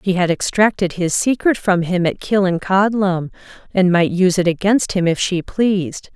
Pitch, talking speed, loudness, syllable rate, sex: 185 Hz, 175 wpm, -17 LUFS, 4.8 syllables/s, female